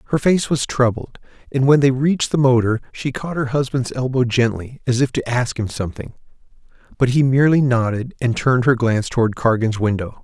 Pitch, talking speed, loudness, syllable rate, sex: 125 Hz, 195 wpm, -18 LUFS, 5.7 syllables/s, male